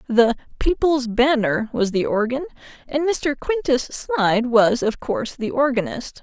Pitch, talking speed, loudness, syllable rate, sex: 250 Hz, 145 wpm, -20 LUFS, 4.4 syllables/s, female